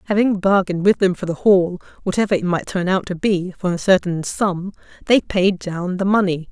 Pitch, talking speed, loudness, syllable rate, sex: 185 Hz, 210 wpm, -19 LUFS, 5.3 syllables/s, female